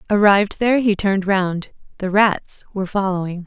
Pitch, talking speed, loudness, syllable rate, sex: 195 Hz, 155 wpm, -18 LUFS, 5.5 syllables/s, female